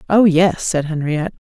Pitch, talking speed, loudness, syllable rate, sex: 170 Hz, 160 wpm, -16 LUFS, 5.2 syllables/s, female